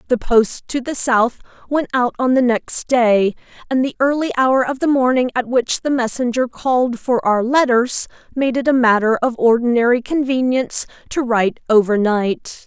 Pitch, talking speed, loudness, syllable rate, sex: 245 Hz, 170 wpm, -17 LUFS, 4.7 syllables/s, female